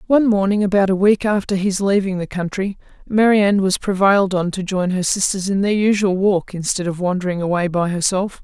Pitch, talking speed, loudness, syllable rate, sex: 195 Hz, 200 wpm, -18 LUFS, 5.6 syllables/s, female